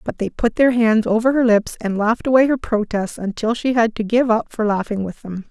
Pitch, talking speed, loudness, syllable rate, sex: 225 Hz, 250 wpm, -18 LUFS, 5.4 syllables/s, female